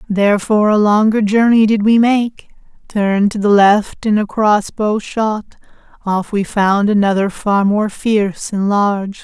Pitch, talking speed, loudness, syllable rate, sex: 210 Hz, 155 wpm, -14 LUFS, 4.3 syllables/s, female